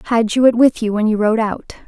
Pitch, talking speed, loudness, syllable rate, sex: 225 Hz, 290 wpm, -15 LUFS, 5.9 syllables/s, female